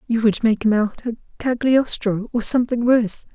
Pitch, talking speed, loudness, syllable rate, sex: 230 Hz, 180 wpm, -19 LUFS, 5.3 syllables/s, female